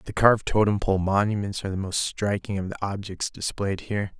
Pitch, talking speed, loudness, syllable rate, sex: 100 Hz, 200 wpm, -25 LUFS, 5.8 syllables/s, male